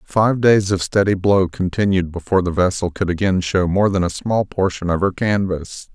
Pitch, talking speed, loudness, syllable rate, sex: 95 Hz, 200 wpm, -18 LUFS, 5.0 syllables/s, male